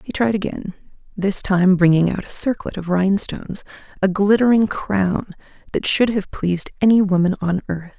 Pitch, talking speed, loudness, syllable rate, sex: 195 Hz, 165 wpm, -19 LUFS, 5.0 syllables/s, female